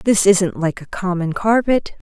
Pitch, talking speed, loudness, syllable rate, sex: 195 Hz, 165 wpm, -18 LUFS, 4.3 syllables/s, female